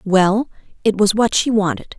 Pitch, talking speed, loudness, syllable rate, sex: 205 Hz, 180 wpm, -17 LUFS, 4.6 syllables/s, female